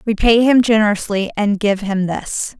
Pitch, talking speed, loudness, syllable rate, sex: 210 Hz, 160 wpm, -16 LUFS, 4.6 syllables/s, female